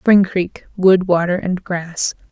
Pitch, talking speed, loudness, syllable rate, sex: 180 Hz, 130 wpm, -17 LUFS, 3.5 syllables/s, female